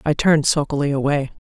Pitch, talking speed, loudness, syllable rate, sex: 145 Hz, 165 wpm, -19 LUFS, 6.5 syllables/s, female